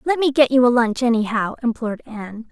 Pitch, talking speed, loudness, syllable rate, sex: 240 Hz, 215 wpm, -18 LUFS, 6.1 syllables/s, female